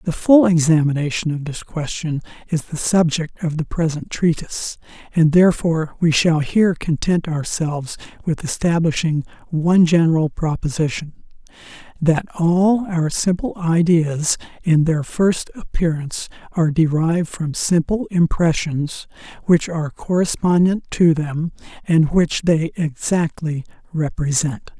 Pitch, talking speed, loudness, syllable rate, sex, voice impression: 165 Hz, 120 wpm, -19 LUFS, 4.4 syllables/s, male, masculine, adult-like, relaxed, weak, slightly dark, soft, muffled, raspy, intellectual, calm, reassuring, slightly wild, kind, modest